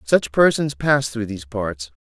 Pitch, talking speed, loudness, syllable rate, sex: 115 Hz, 175 wpm, -20 LUFS, 4.3 syllables/s, male